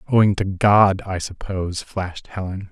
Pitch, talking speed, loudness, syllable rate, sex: 95 Hz, 155 wpm, -20 LUFS, 5.0 syllables/s, male